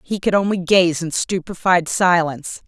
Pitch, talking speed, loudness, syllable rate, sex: 180 Hz, 155 wpm, -18 LUFS, 4.7 syllables/s, female